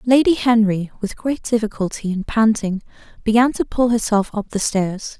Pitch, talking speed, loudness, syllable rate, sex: 220 Hz, 160 wpm, -19 LUFS, 4.9 syllables/s, female